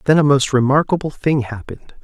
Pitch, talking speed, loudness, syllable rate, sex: 140 Hz, 175 wpm, -16 LUFS, 6.0 syllables/s, male